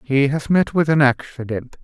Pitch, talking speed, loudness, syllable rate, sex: 140 Hz, 195 wpm, -18 LUFS, 4.7 syllables/s, male